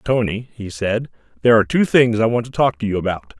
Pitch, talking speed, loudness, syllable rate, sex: 110 Hz, 245 wpm, -18 LUFS, 6.1 syllables/s, male